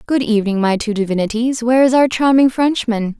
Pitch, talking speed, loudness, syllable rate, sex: 235 Hz, 190 wpm, -15 LUFS, 5.9 syllables/s, female